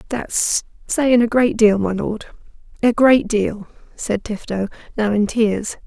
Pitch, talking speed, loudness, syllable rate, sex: 220 Hz, 145 wpm, -18 LUFS, 3.7 syllables/s, female